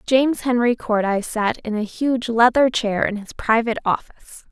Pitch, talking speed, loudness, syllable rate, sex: 230 Hz, 175 wpm, -20 LUFS, 5.1 syllables/s, female